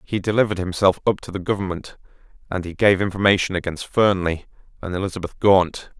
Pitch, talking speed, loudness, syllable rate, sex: 95 Hz, 160 wpm, -21 LUFS, 6.1 syllables/s, male